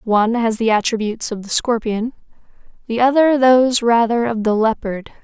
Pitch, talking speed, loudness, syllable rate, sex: 230 Hz, 160 wpm, -17 LUFS, 5.3 syllables/s, female